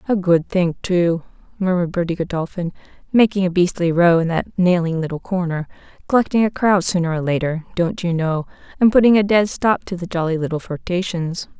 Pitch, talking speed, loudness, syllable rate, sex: 180 Hz, 180 wpm, -19 LUFS, 5.5 syllables/s, female